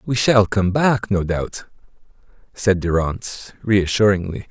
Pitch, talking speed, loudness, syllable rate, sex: 100 Hz, 120 wpm, -19 LUFS, 4.0 syllables/s, male